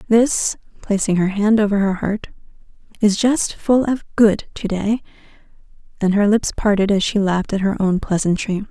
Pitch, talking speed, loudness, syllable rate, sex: 205 Hz, 170 wpm, -18 LUFS, 4.9 syllables/s, female